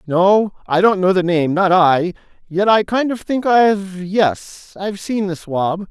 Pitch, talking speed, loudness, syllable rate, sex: 190 Hz, 185 wpm, -16 LUFS, 4.0 syllables/s, male